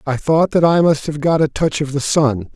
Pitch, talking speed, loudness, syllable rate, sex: 150 Hz, 280 wpm, -16 LUFS, 4.9 syllables/s, male